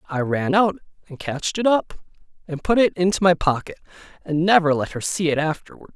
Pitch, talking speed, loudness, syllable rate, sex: 170 Hz, 200 wpm, -20 LUFS, 5.9 syllables/s, male